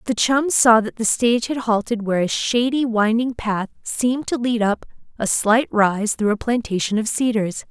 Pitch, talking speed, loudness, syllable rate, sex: 225 Hz, 195 wpm, -19 LUFS, 4.8 syllables/s, female